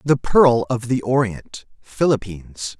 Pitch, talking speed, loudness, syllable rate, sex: 120 Hz, 105 wpm, -19 LUFS, 4.0 syllables/s, male